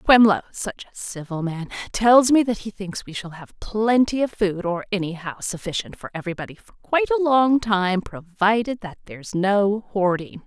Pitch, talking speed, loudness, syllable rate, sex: 200 Hz, 170 wpm, -22 LUFS, 5.0 syllables/s, female